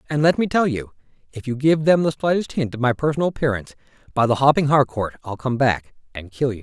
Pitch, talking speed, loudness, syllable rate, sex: 135 Hz, 235 wpm, -20 LUFS, 6.2 syllables/s, male